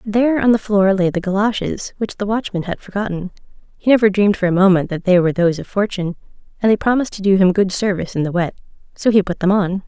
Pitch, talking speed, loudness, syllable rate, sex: 195 Hz, 245 wpm, -17 LUFS, 6.8 syllables/s, female